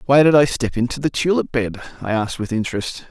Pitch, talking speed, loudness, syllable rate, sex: 130 Hz, 230 wpm, -19 LUFS, 6.2 syllables/s, male